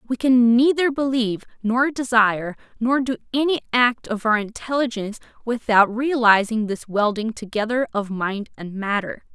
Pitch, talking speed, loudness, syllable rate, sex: 230 Hz, 140 wpm, -20 LUFS, 4.8 syllables/s, female